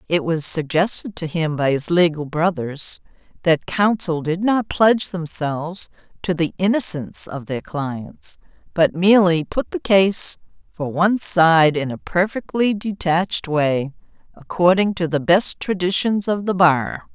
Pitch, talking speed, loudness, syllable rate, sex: 175 Hz, 145 wpm, -19 LUFS, 4.3 syllables/s, female